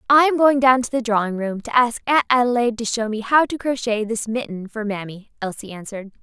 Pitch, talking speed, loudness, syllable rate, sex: 230 Hz, 230 wpm, -20 LUFS, 5.9 syllables/s, female